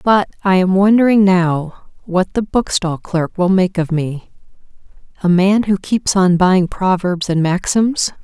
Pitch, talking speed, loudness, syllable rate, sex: 185 Hz, 160 wpm, -15 LUFS, 4.0 syllables/s, female